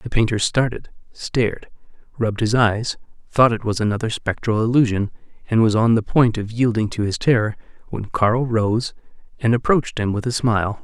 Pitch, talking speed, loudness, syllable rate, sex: 115 Hz, 175 wpm, -20 LUFS, 5.3 syllables/s, male